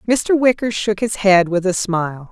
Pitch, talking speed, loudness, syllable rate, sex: 200 Hz, 210 wpm, -17 LUFS, 4.7 syllables/s, female